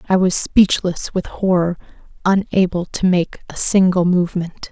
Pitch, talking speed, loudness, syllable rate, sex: 180 Hz, 140 wpm, -17 LUFS, 4.5 syllables/s, female